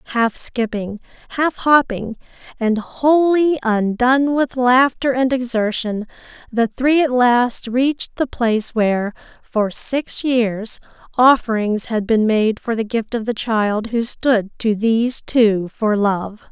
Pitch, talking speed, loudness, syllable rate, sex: 235 Hz, 140 wpm, -18 LUFS, 3.7 syllables/s, female